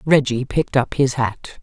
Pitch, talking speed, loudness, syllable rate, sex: 130 Hz, 185 wpm, -19 LUFS, 4.6 syllables/s, female